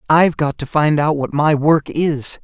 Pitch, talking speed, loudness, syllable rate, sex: 150 Hz, 220 wpm, -16 LUFS, 4.5 syllables/s, male